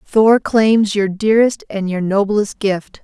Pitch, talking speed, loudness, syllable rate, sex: 205 Hz, 160 wpm, -15 LUFS, 3.8 syllables/s, female